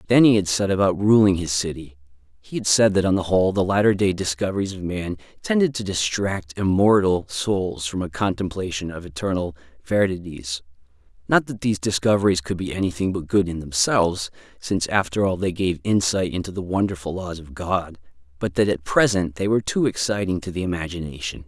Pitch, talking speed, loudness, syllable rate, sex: 95 Hz, 180 wpm, -22 LUFS, 5.6 syllables/s, male